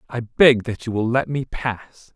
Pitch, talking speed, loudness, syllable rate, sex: 120 Hz, 220 wpm, -20 LUFS, 4.1 syllables/s, male